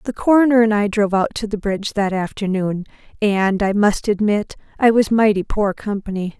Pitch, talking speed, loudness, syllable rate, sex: 205 Hz, 190 wpm, -18 LUFS, 5.4 syllables/s, female